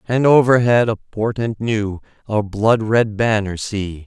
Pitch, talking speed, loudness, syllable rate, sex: 110 Hz, 145 wpm, -17 LUFS, 3.8 syllables/s, male